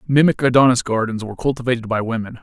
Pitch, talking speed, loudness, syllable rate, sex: 120 Hz, 175 wpm, -18 LUFS, 7.1 syllables/s, male